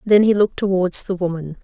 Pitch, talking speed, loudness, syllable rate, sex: 190 Hz, 220 wpm, -18 LUFS, 6.0 syllables/s, female